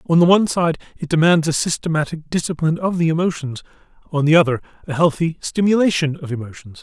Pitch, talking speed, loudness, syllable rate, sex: 160 Hz, 175 wpm, -18 LUFS, 6.4 syllables/s, male